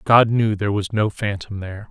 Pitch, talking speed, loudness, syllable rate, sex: 105 Hz, 220 wpm, -20 LUFS, 5.5 syllables/s, male